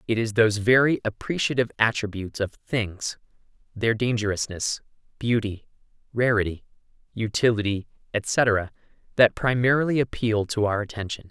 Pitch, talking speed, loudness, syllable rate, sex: 110 Hz, 105 wpm, -24 LUFS, 5.2 syllables/s, male